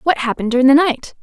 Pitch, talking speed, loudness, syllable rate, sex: 270 Hz, 245 wpm, -14 LUFS, 7.4 syllables/s, female